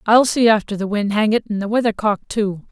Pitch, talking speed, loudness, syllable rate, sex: 215 Hz, 265 wpm, -18 LUFS, 5.5 syllables/s, female